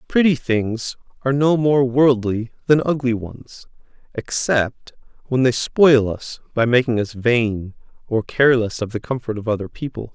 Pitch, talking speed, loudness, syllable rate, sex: 125 Hz, 155 wpm, -19 LUFS, 4.4 syllables/s, male